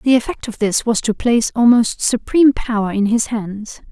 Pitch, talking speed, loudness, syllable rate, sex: 230 Hz, 200 wpm, -16 LUFS, 5.1 syllables/s, female